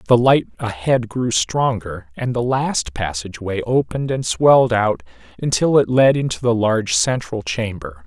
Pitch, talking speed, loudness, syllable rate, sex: 115 Hz, 155 wpm, -18 LUFS, 4.6 syllables/s, male